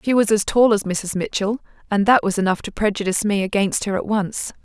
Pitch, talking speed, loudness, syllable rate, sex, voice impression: 205 Hz, 235 wpm, -20 LUFS, 5.8 syllables/s, female, very feminine, young, slightly adult-like, thin, very tensed, slightly powerful, bright, hard, very clear, very fluent, cute, slightly cool, refreshing, sincere, friendly, reassuring, slightly unique, slightly wild, slightly sweet, very lively, slightly strict, slightly intense